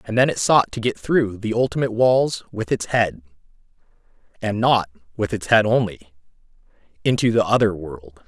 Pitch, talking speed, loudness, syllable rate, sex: 105 Hz, 150 wpm, -20 LUFS, 5.0 syllables/s, male